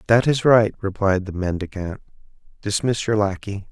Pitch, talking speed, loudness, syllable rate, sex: 105 Hz, 145 wpm, -21 LUFS, 4.8 syllables/s, male